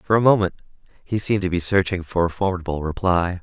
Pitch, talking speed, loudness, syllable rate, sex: 90 Hz, 210 wpm, -21 LUFS, 6.4 syllables/s, male